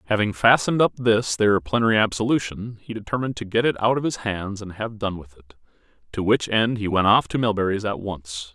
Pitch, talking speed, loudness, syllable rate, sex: 110 Hz, 220 wpm, -22 LUFS, 5.8 syllables/s, male